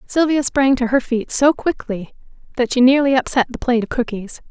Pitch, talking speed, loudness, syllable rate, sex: 255 Hz, 200 wpm, -17 LUFS, 5.4 syllables/s, female